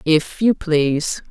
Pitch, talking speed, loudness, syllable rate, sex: 165 Hz, 140 wpm, -18 LUFS, 3.5 syllables/s, female